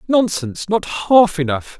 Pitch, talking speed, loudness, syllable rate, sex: 185 Hz, 135 wpm, -17 LUFS, 4.3 syllables/s, male